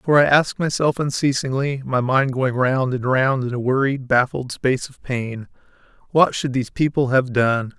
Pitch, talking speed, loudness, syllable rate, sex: 130 Hz, 175 wpm, -20 LUFS, 4.7 syllables/s, male